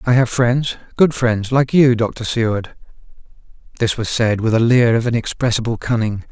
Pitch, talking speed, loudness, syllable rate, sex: 115 Hz, 150 wpm, -17 LUFS, 4.9 syllables/s, male